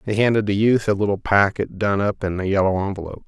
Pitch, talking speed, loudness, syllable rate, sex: 100 Hz, 240 wpm, -20 LUFS, 6.5 syllables/s, male